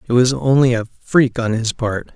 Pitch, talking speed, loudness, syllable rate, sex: 120 Hz, 225 wpm, -17 LUFS, 4.9 syllables/s, male